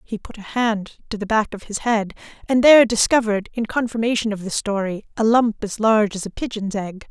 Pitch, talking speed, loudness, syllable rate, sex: 215 Hz, 220 wpm, -20 LUFS, 5.8 syllables/s, female